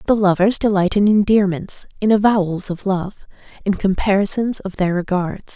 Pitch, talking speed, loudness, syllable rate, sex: 195 Hz, 150 wpm, -18 LUFS, 5.0 syllables/s, female